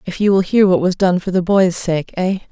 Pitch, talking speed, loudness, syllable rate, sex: 185 Hz, 260 wpm, -16 LUFS, 5.3 syllables/s, female